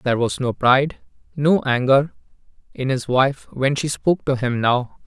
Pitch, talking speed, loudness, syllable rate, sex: 135 Hz, 180 wpm, -19 LUFS, 4.9 syllables/s, male